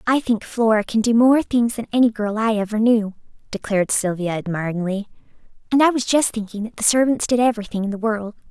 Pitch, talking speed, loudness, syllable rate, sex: 220 Hz, 205 wpm, -19 LUFS, 6.0 syllables/s, female